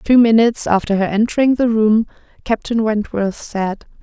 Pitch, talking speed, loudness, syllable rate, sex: 220 Hz, 150 wpm, -16 LUFS, 5.1 syllables/s, female